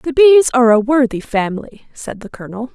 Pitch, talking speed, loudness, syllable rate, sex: 250 Hz, 195 wpm, -13 LUFS, 5.8 syllables/s, female